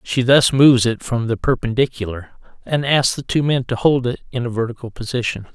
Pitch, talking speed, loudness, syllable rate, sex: 125 Hz, 205 wpm, -18 LUFS, 5.6 syllables/s, male